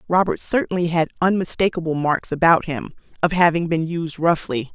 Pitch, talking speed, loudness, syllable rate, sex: 170 Hz, 150 wpm, -20 LUFS, 5.3 syllables/s, female